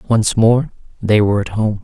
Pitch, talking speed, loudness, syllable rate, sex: 110 Hz, 195 wpm, -15 LUFS, 4.6 syllables/s, male